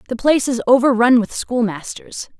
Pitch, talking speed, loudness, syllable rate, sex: 240 Hz, 150 wpm, -16 LUFS, 5.3 syllables/s, female